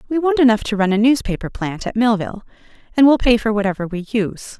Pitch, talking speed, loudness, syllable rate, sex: 225 Hz, 220 wpm, -17 LUFS, 6.5 syllables/s, female